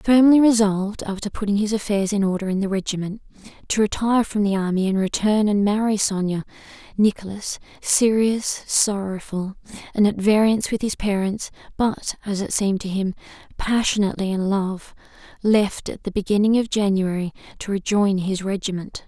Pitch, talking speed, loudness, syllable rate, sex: 205 Hz, 155 wpm, -21 LUFS, 5.3 syllables/s, female